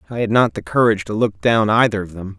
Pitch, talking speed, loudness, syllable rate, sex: 105 Hz, 275 wpm, -17 LUFS, 6.4 syllables/s, male